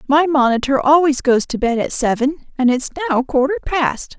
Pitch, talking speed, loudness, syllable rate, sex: 270 Hz, 185 wpm, -17 LUFS, 5.1 syllables/s, female